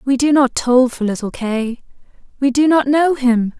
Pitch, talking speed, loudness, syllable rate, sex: 260 Hz, 200 wpm, -16 LUFS, 4.4 syllables/s, female